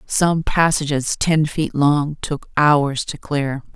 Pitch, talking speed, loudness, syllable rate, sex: 150 Hz, 145 wpm, -19 LUFS, 3.2 syllables/s, female